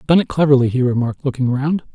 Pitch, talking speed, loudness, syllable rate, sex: 135 Hz, 215 wpm, -17 LUFS, 7.0 syllables/s, male